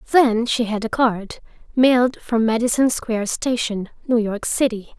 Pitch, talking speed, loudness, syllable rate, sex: 230 Hz, 155 wpm, -20 LUFS, 4.6 syllables/s, female